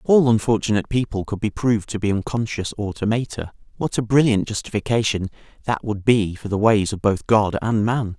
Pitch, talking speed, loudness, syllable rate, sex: 110 Hz, 190 wpm, -21 LUFS, 5.7 syllables/s, male